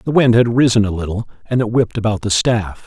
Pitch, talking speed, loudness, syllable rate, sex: 110 Hz, 250 wpm, -16 LUFS, 6.2 syllables/s, male